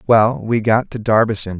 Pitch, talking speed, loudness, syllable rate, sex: 110 Hz, 190 wpm, -16 LUFS, 4.8 syllables/s, male